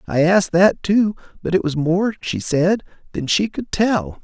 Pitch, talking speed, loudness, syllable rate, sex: 175 Hz, 200 wpm, -18 LUFS, 4.6 syllables/s, male